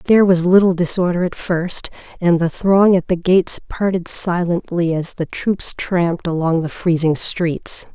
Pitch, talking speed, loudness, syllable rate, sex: 175 Hz, 165 wpm, -17 LUFS, 4.5 syllables/s, female